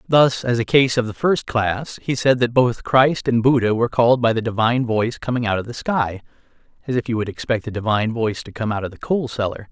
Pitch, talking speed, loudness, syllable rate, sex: 120 Hz, 255 wpm, -19 LUFS, 6.0 syllables/s, male